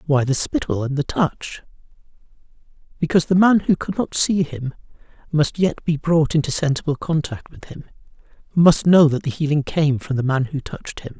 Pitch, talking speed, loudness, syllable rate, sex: 155 Hz, 175 wpm, -19 LUFS, 5.2 syllables/s, male